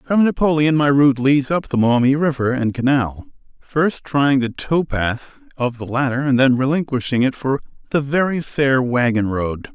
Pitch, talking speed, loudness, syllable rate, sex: 135 Hz, 180 wpm, -18 LUFS, 4.7 syllables/s, male